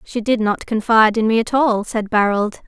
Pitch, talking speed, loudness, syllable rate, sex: 220 Hz, 225 wpm, -17 LUFS, 5.2 syllables/s, female